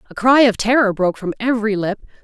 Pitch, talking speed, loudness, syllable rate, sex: 220 Hz, 215 wpm, -16 LUFS, 6.9 syllables/s, female